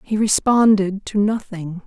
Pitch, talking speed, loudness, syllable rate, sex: 205 Hz, 130 wpm, -18 LUFS, 4.0 syllables/s, female